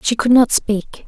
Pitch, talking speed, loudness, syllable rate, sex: 230 Hz, 225 wpm, -15 LUFS, 4.1 syllables/s, female